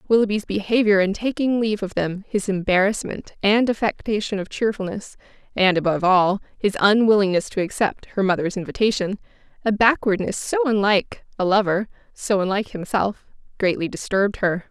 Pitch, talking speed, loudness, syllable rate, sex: 205 Hz, 145 wpm, -21 LUFS, 5.5 syllables/s, female